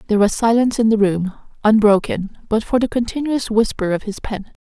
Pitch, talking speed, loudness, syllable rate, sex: 220 Hz, 195 wpm, -18 LUFS, 5.7 syllables/s, female